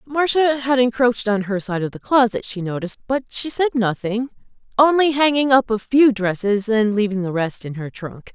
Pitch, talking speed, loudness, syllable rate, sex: 230 Hz, 200 wpm, -19 LUFS, 5.2 syllables/s, female